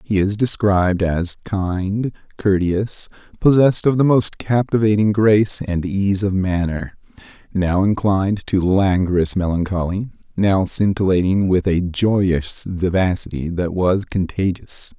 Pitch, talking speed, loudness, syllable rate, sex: 95 Hz, 120 wpm, -18 LUFS, 4.1 syllables/s, male